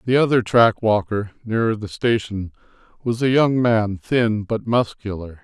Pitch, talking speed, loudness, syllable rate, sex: 110 Hz, 155 wpm, -20 LUFS, 4.4 syllables/s, male